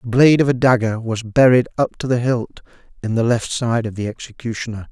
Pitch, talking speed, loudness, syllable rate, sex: 120 Hz, 220 wpm, -18 LUFS, 5.7 syllables/s, male